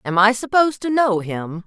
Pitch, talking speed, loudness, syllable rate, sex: 215 Hz, 215 wpm, -18 LUFS, 5.1 syllables/s, female